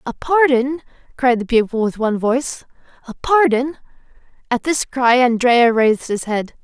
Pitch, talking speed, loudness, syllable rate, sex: 250 Hz, 145 wpm, -16 LUFS, 4.9 syllables/s, female